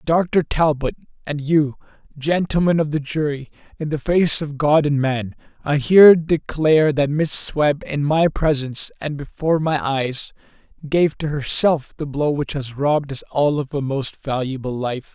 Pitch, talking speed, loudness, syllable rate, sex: 145 Hz, 170 wpm, -19 LUFS, 4.5 syllables/s, male